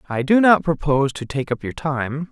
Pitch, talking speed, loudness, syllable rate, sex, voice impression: 145 Hz, 235 wpm, -19 LUFS, 5.2 syllables/s, male, masculine, adult-like, slightly middle-aged, slightly thick, tensed, bright, soft, clear, fluent, cool, very intellectual, very refreshing, sincere, calm, very friendly, reassuring, sweet, kind